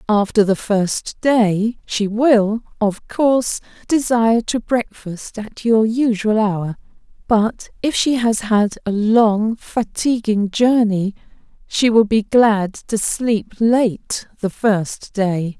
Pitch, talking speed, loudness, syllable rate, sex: 220 Hz, 130 wpm, -17 LUFS, 3.2 syllables/s, female